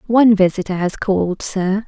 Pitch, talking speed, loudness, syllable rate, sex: 200 Hz, 160 wpm, -17 LUFS, 5.3 syllables/s, female